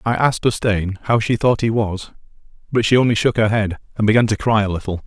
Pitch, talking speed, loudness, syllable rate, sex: 110 Hz, 235 wpm, -18 LUFS, 6.2 syllables/s, male